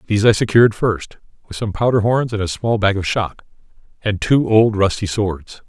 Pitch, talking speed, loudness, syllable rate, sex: 105 Hz, 200 wpm, -17 LUFS, 5.1 syllables/s, male